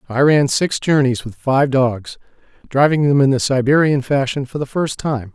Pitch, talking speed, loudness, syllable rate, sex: 135 Hz, 190 wpm, -16 LUFS, 4.7 syllables/s, male